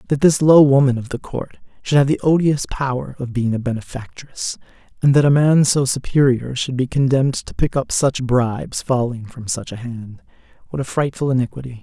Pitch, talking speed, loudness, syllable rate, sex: 130 Hz, 200 wpm, -18 LUFS, 5.3 syllables/s, male